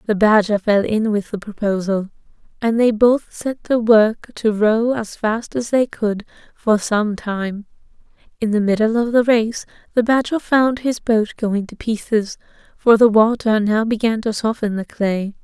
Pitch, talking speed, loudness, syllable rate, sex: 220 Hz, 180 wpm, -18 LUFS, 4.2 syllables/s, female